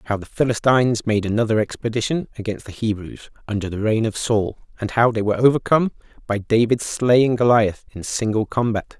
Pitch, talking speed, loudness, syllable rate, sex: 115 Hz, 175 wpm, -20 LUFS, 5.7 syllables/s, male